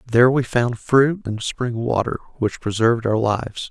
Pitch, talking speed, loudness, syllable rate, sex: 120 Hz, 180 wpm, -20 LUFS, 4.9 syllables/s, male